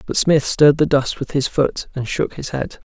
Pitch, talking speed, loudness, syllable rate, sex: 140 Hz, 245 wpm, -18 LUFS, 4.9 syllables/s, male